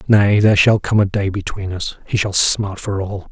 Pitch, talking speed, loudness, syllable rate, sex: 100 Hz, 235 wpm, -16 LUFS, 4.9 syllables/s, male